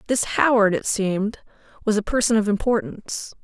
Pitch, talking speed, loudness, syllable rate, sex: 215 Hz, 155 wpm, -21 LUFS, 5.5 syllables/s, female